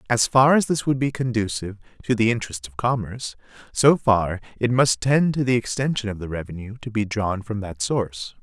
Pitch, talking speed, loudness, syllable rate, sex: 110 Hz, 205 wpm, -22 LUFS, 5.6 syllables/s, male